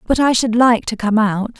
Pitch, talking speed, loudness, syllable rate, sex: 230 Hz, 265 wpm, -15 LUFS, 5.0 syllables/s, female